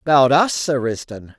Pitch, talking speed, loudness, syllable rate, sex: 135 Hz, 175 wpm, -17 LUFS, 3.9 syllables/s, male